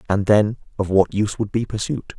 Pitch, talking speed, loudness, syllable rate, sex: 105 Hz, 220 wpm, -20 LUFS, 5.6 syllables/s, male